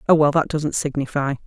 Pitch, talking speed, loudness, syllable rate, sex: 145 Hz, 205 wpm, -20 LUFS, 5.6 syllables/s, female